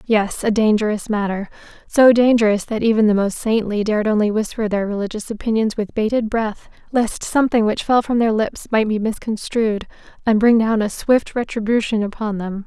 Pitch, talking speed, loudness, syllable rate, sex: 215 Hz, 175 wpm, -18 LUFS, 5.3 syllables/s, female